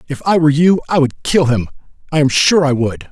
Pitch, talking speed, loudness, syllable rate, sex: 145 Hz, 230 wpm, -14 LUFS, 5.8 syllables/s, male